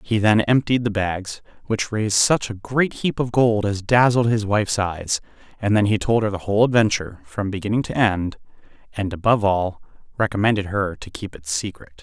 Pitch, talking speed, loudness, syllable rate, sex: 105 Hz, 195 wpm, -21 LUFS, 5.4 syllables/s, male